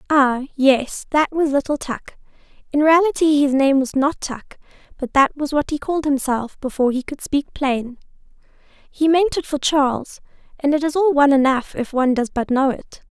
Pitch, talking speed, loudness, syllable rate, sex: 280 Hz, 190 wpm, -19 LUFS, 5.0 syllables/s, female